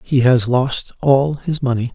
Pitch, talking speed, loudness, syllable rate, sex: 130 Hz, 185 wpm, -17 LUFS, 4.0 syllables/s, male